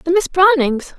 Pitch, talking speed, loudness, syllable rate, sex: 335 Hz, 180 wpm, -14 LUFS, 4.3 syllables/s, female